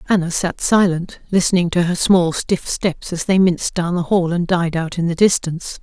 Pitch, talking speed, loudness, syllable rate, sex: 175 Hz, 215 wpm, -17 LUFS, 5.1 syllables/s, female